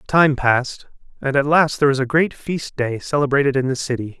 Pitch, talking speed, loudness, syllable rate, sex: 140 Hz, 215 wpm, -19 LUFS, 5.6 syllables/s, male